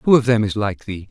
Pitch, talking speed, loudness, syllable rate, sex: 110 Hz, 325 wpm, -18 LUFS, 5.6 syllables/s, male